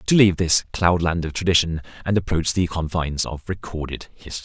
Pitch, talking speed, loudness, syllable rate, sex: 85 Hz, 175 wpm, -21 LUFS, 6.2 syllables/s, male